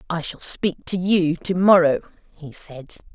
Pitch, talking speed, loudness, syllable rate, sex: 170 Hz, 155 wpm, -20 LUFS, 4.0 syllables/s, female